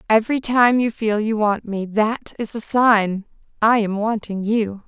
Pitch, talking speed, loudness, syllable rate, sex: 215 Hz, 185 wpm, -19 LUFS, 4.2 syllables/s, female